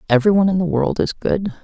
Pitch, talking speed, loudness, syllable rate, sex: 170 Hz, 255 wpm, -18 LUFS, 7.3 syllables/s, female